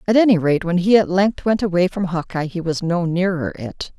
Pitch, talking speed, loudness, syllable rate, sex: 185 Hz, 240 wpm, -19 LUFS, 5.3 syllables/s, female